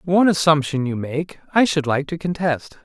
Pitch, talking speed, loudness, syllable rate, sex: 155 Hz, 190 wpm, -20 LUFS, 5.1 syllables/s, male